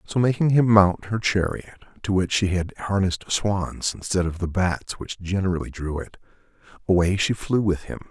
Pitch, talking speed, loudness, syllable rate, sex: 95 Hz, 185 wpm, -23 LUFS, 5.0 syllables/s, male